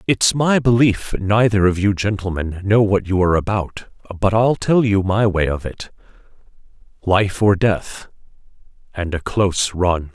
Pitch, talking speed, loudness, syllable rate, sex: 100 Hz, 155 wpm, -17 LUFS, 4.4 syllables/s, male